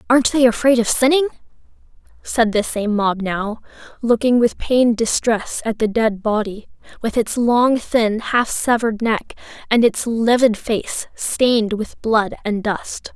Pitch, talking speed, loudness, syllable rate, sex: 230 Hz, 155 wpm, -18 LUFS, 4.2 syllables/s, female